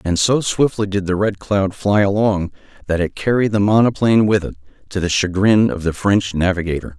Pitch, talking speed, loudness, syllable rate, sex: 100 Hz, 200 wpm, -17 LUFS, 5.3 syllables/s, male